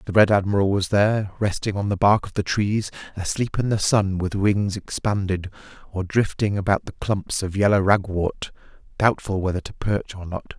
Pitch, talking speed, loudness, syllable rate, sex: 100 Hz, 185 wpm, -22 LUFS, 5.0 syllables/s, male